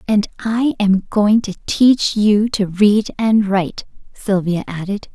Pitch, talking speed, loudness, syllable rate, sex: 205 Hz, 150 wpm, -16 LUFS, 3.7 syllables/s, female